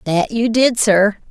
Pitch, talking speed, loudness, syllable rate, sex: 215 Hz, 185 wpm, -15 LUFS, 3.6 syllables/s, female